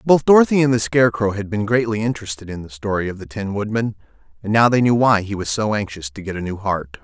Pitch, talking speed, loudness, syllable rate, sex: 105 Hz, 255 wpm, -19 LUFS, 6.4 syllables/s, male